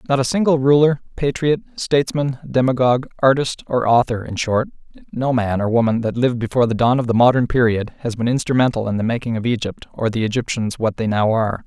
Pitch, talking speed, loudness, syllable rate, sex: 125 Hz, 205 wpm, -18 LUFS, 6.2 syllables/s, male